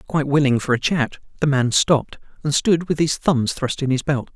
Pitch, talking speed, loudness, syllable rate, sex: 140 Hz, 235 wpm, -20 LUFS, 5.4 syllables/s, male